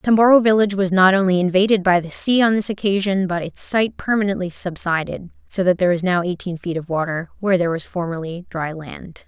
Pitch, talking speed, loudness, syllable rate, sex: 185 Hz, 205 wpm, -19 LUFS, 6.0 syllables/s, female